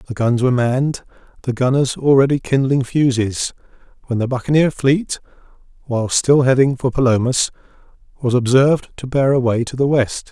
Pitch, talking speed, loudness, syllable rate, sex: 130 Hz, 150 wpm, -17 LUFS, 5.2 syllables/s, male